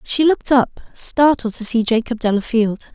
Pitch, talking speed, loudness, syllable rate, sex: 240 Hz, 165 wpm, -17 LUFS, 5.0 syllables/s, female